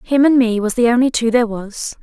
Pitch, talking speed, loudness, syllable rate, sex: 235 Hz, 265 wpm, -15 LUFS, 5.9 syllables/s, female